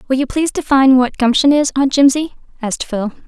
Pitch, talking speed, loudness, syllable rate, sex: 265 Hz, 200 wpm, -14 LUFS, 6.5 syllables/s, female